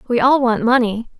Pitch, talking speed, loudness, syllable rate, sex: 240 Hz, 200 wpm, -16 LUFS, 5.2 syllables/s, female